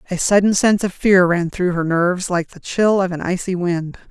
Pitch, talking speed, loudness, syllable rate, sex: 185 Hz, 235 wpm, -17 LUFS, 5.3 syllables/s, female